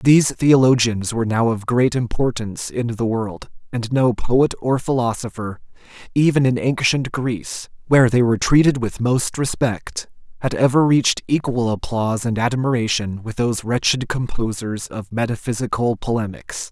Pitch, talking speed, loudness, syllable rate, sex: 120 Hz, 145 wpm, -19 LUFS, 4.9 syllables/s, male